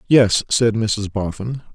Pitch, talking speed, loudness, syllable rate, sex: 110 Hz, 135 wpm, -19 LUFS, 3.7 syllables/s, male